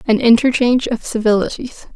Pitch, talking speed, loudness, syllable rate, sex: 235 Hz, 125 wpm, -15 LUFS, 5.6 syllables/s, female